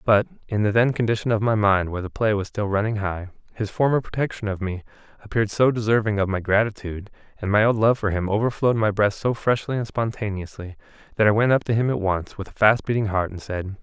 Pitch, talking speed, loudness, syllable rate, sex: 105 Hz, 235 wpm, -22 LUFS, 6.3 syllables/s, male